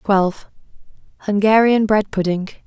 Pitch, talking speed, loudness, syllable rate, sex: 205 Hz, 70 wpm, -17 LUFS, 4.9 syllables/s, female